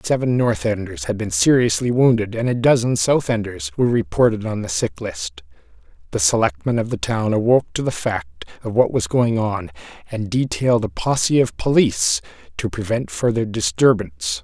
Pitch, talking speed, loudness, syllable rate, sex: 120 Hz, 175 wpm, -19 LUFS, 5.2 syllables/s, male